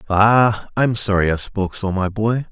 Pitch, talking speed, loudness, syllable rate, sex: 105 Hz, 190 wpm, -18 LUFS, 4.6 syllables/s, male